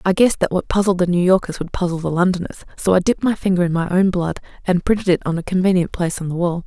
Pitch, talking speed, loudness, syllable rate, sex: 180 Hz, 280 wpm, -18 LUFS, 7.1 syllables/s, female